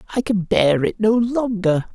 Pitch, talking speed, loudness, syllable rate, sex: 205 Hz, 185 wpm, -19 LUFS, 4.4 syllables/s, male